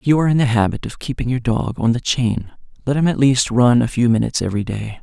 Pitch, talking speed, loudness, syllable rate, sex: 125 Hz, 275 wpm, -18 LUFS, 6.4 syllables/s, male